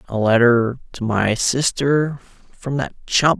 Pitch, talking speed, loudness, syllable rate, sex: 125 Hz, 140 wpm, -18 LUFS, 3.3 syllables/s, male